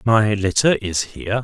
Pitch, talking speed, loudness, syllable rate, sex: 105 Hz, 165 wpm, -19 LUFS, 4.6 syllables/s, male